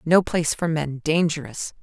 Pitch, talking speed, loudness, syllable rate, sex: 155 Hz, 130 wpm, -23 LUFS, 4.8 syllables/s, female